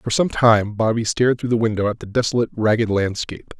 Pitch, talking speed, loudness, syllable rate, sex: 110 Hz, 215 wpm, -19 LUFS, 6.3 syllables/s, male